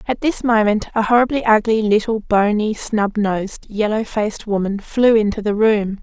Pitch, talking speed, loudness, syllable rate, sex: 215 Hz, 170 wpm, -17 LUFS, 4.8 syllables/s, female